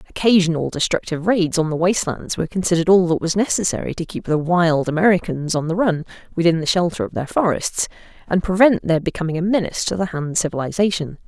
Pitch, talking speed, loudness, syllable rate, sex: 175 Hz, 195 wpm, -19 LUFS, 6.4 syllables/s, female